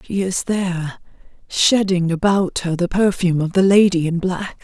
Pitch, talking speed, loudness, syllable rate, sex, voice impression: 180 Hz, 170 wpm, -18 LUFS, 4.8 syllables/s, female, very feminine, old, very thin, slightly tensed, powerful, bright, soft, very clear, very fluent, raspy, cool, very intellectual, very refreshing, sincere, slightly calm, slightly friendly, slightly reassuring, very unique, elegant, very wild, slightly sweet, very lively, very intense, sharp, light